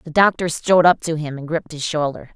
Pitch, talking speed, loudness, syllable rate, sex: 160 Hz, 255 wpm, -19 LUFS, 6.3 syllables/s, female